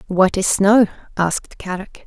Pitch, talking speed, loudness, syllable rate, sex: 195 Hz, 145 wpm, -17 LUFS, 4.5 syllables/s, female